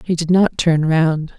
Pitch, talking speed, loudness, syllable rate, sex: 165 Hz, 215 wpm, -16 LUFS, 4.0 syllables/s, female